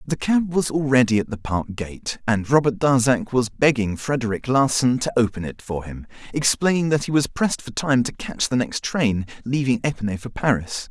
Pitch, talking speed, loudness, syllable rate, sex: 125 Hz, 200 wpm, -21 LUFS, 5.1 syllables/s, male